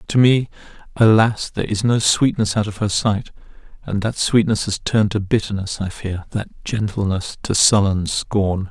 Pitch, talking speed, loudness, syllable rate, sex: 105 Hz, 170 wpm, -19 LUFS, 4.8 syllables/s, male